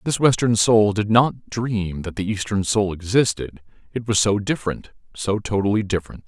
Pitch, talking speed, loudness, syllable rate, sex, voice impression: 105 Hz, 170 wpm, -21 LUFS, 5.0 syllables/s, male, masculine, adult-like, slightly thick, slightly fluent, cool, slightly intellectual